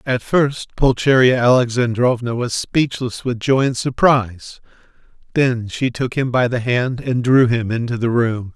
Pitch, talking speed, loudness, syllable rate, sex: 125 Hz, 160 wpm, -17 LUFS, 4.3 syllables/s, male